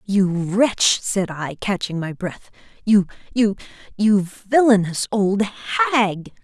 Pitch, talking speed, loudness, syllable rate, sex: 200 Hz, 95 wpm, -20 LUFS, 3.2 syllables/s, female